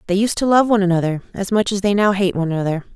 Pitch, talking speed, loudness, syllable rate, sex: 195 Hz, 285 wpm, -18 LUFS, 7.7 syllables/s, female